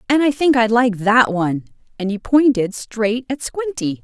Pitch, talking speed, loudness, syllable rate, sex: 235 Hz, 195 wpm, -17 LUFS, 4.6 syllables/s, female